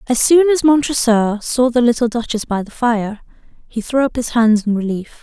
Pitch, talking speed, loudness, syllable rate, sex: 235 Hz, 205 wpm, -15 LUFS, 5.0 syllables/s, female